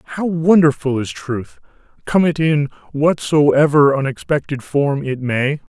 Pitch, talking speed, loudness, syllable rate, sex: 145 Hz, 125 wpm, -17 LUFS, 3.9 syllables/s, male